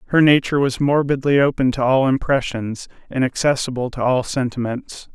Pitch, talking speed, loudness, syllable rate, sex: 130 Hz, 150 wpm, -19 LUFS, 5.4 syllables/s, male